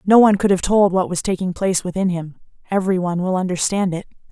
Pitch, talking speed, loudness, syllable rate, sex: 185 Hz, 225 wpm, -18 LUFS, 6.8 syllables/s, female